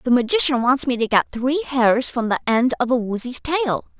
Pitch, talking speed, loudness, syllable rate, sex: 255 Hz, 225 wpm, -19 LUFS, 5.0 syllables/s, female